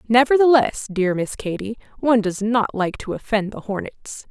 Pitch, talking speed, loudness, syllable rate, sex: 220 Hz, 165 wpm, -20 LUFS, 4.9 syllables/s, female